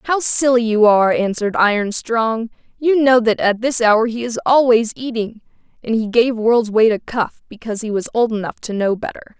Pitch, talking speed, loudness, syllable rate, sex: 230 Hz, 205 wpm, -16 LUFS, 5.1 syllables/s, female